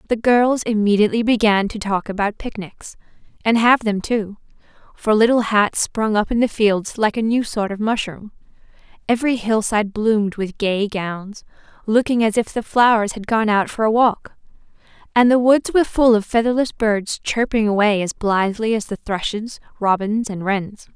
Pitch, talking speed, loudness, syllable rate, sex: 215 Hz, 170 wpm, -18 LUFS, 4.9 syllables/s, female